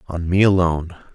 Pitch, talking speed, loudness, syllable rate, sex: 90 Hz, 155 wpm, -18 LUFS, 5.8 syllables/s, male